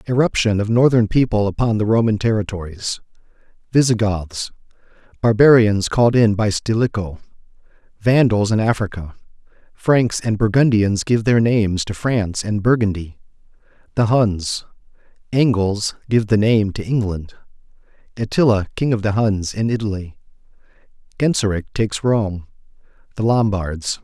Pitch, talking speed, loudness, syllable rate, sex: 110 Hz, 95 wpm, -18 LUFS, 4.8 syllables/s, male